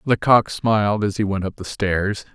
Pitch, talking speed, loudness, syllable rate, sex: 100 Hz, 205 wpm, -20 LUFS, 4.6 syllables/s, male